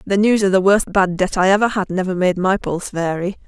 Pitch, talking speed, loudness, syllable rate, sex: 190 Hz, 260 wpm, -17 LUFS, 5.8 syllables/s, female